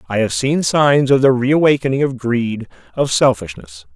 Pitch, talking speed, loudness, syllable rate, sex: 125 Hz, 165 wpm, -15 LUFS, 4.6 syllables/s, male